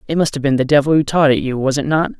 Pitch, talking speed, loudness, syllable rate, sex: 145 Hz, 355 wpm, -15 LUFS, 7.1 syllables/s, male